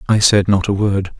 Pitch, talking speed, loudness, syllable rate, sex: 100 Hz, 250 wpm, -15 LUFS, 4.9 syllables/s, male